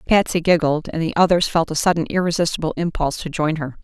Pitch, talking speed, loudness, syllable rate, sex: 165 Hz, 205 wpm, -19 LUFS, 6.4 syllables/s, female